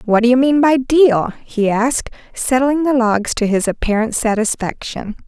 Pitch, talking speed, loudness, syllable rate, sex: 240 Hz, 170 wpm, -16 LUFS, 4.6 syllables/s, female